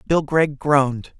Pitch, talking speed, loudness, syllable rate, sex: 145 Hz, 150 wpm, -19 LUFS, 3.9 syllables/s, male